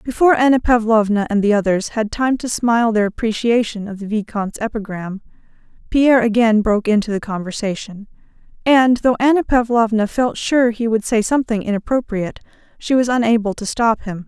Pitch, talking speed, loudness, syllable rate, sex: 225 Hz, 165 wpm, -17 LUFS, 5.7 syllables/s, female